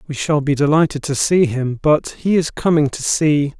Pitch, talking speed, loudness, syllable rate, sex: 150 Hz, 215 wpm, -17 LUFS, 4.7 syllables/s, male